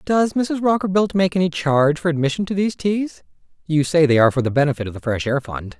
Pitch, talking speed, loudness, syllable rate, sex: 160 Hz, 230 wpm, -19 LUFS, 6.3 syllables/s, male